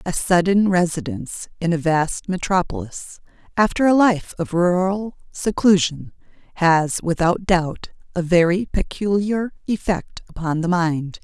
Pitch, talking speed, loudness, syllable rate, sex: 180 Hz, 125 wpm, -20 LUFS, 4.2 syllables/s, female